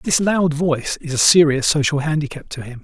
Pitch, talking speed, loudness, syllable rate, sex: 150 Hz, 210 wpm, -17 LUFS, 5.6 syllables/s, male